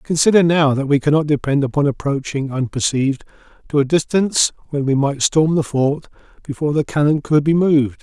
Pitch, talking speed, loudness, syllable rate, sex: 145 Hz, 180 wpm, -17 LUFS, 5.8 syllables/s, male